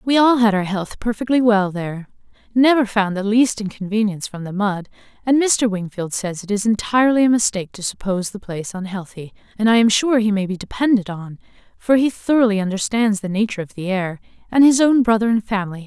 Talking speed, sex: 220 wpm, female